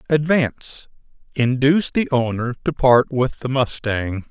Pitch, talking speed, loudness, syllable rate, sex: 130 Hz, 125 wpm, -19 LUFS, 4.3 syllables/s, male